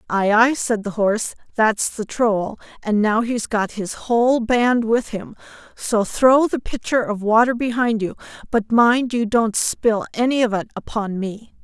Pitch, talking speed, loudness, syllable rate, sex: 225 Hz, 180 wpm, -19 LUFS, 4.2 syllables/s, female